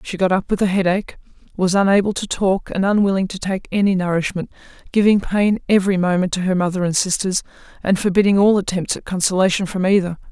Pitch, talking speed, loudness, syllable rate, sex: 190 Hz, 190 wpm, -18 LUFS, 6.2 syllables/s, female